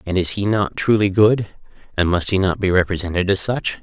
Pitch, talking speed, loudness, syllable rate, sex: 95 Hz, 220 wpm, -18 LUFS, 5.5 syllables/s, male